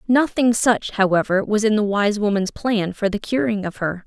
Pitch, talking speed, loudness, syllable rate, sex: 210 Hz, 205 wpm, -20 LUFS, 4.9 syllables/s, female